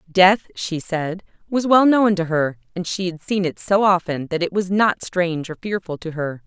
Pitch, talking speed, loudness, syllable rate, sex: 180 Hz, 225 wpm, -20 LUFS, 4.7 syllables/s, female